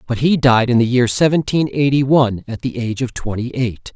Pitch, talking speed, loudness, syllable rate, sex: 125 Hz, 225 wpm, -16 LUFS, 5.6 syllables/s, male